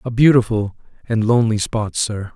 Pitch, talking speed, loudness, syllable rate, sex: 110 Hz, 155 wpm, -18 LUFS, 5.1 syllables/s, male